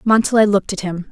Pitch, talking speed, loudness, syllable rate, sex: 200 Hz, 215 wpm, -16 LUFS, 6.9 syllables/s, female